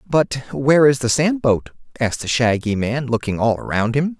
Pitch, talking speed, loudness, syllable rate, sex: 130 Hz, 200 wpm, -18 LUFS, 5.2 syllables/s, male